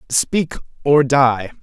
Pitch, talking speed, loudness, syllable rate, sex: 135 Hz, 110 wpm, -16 LUFS, 2.8 syllables/s, male